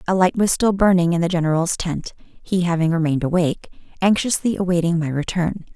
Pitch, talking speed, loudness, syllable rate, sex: 175 Hz, 175 wpm, -19 LUFS, 5.9 syllables/s, female